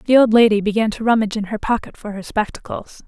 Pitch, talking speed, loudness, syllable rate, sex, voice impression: 215 Hz, 235 wpm, -17 LUFS, 6.3 syllables/s, female, feminine, adult-like, fluent, slightly unique